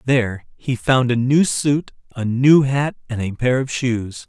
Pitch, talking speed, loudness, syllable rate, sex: 125 Hz, 195 wpm, -18 LUFS, 4.1 syllables/s, male